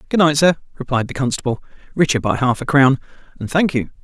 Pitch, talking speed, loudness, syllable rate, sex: 140 Hz, 195 wpm, -17 LUFS, 6.3 syllables/s, male